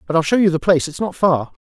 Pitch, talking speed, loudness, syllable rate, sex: 170 Hz, 330 wpm, -17 LUFS, 7.0 syllables/s, male